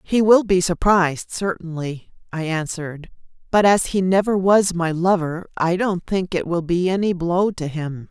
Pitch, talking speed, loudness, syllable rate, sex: 175 Hz, 180 wpm, -20 LUFS, 4.5 syllables/s, female